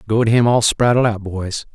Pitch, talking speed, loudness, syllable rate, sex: 110 Hz, 240 wpm, -16 LUFS, 5.2 syllables/s, male